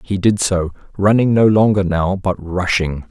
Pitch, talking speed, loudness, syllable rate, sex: 95 Hz, 175 wpm, -16 LUFS, 4.4 syllables/s, male